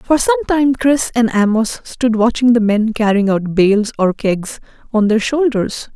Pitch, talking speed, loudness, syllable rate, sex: 230 Hz, 180 wpm, -15 LUFS, 4.3 syllables/s, female